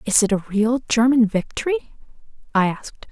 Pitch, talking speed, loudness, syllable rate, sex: 230 Hz, 155 wpm, -20 LUFS, 5.1 syllables/s, female